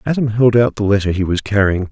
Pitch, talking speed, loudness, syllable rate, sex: 105 Hz, 250 wpm, -15 LUFS, 6.2 syllables/s, male